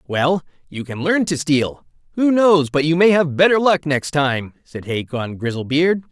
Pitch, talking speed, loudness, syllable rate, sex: 155 Hz, 185 wpm, -18 LUFS, 4.3 syllables/s, male